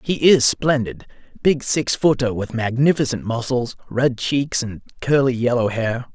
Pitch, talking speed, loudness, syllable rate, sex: 125 Hz, 145 wpm, -19 LUFS, 4.3 syllables/s, male